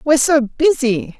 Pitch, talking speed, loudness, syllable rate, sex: 265 Hz, 150 wpm, -15 LUFS, 4.6 syllables/s, female